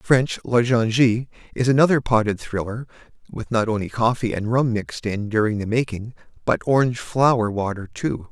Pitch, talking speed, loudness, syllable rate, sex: 115 Hz, 165 wpm, -21 LUFS, 5.2 syllables/s, male